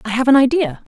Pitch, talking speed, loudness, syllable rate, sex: 250 Hz, 250 wpm, -15 LUFS, 6.5 syllables/s, female